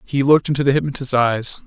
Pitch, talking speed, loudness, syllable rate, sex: 135 Hz, 215 wpm, -17 LUFS, 6.5 syllables/s, male